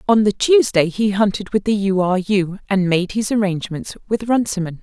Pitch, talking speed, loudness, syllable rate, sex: 200 Hz, 200 wpm, -18 LUFS, 5.2 syllables/s, female